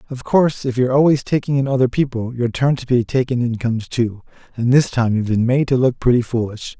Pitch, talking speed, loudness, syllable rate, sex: 125 Hz, 245 wpm, -18 LUFS, 6.2 syllables/s, male